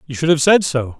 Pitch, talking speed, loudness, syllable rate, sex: 145 Hz, 300 wpm, -15 LUFS, 5.8 syllables/s, male